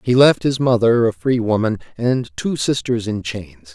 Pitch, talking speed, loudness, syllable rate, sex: 115 Hz, 190 wpm, -18 LUFS, 4.4 syllables/s, male